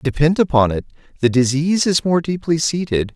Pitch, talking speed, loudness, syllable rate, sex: 155 Hz, 170 wpm, -17 LUFS, 5.5 syllables/s, male